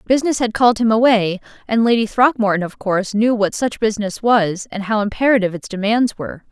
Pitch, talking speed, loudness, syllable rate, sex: 215 Hz, 195 wpm, -17 LUFS, 6.2 syllables/s, female